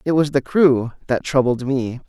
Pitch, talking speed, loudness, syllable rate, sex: 135 Hz, 200 wpm, -19 LUFS, 4.5 syllables/s, male